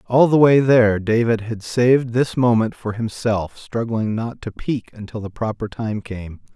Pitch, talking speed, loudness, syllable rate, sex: 115 Hz, 185 wpm, -19 LUFS, 4.4 syllables/s, male